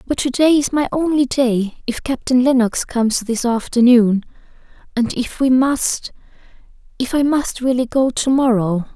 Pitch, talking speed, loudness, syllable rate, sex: 250 Hz, 155 wpm, -17 LUFS, 4.5 syllables/s, female